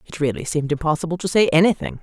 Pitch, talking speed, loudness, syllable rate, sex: 160 Hz, 210 wpm, -20 LUFS, 7.3 syllables/s, female